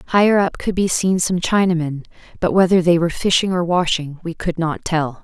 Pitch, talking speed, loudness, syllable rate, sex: 175 Hz, 205 wpm, -18 LUFS, 5.2 syllables/s, female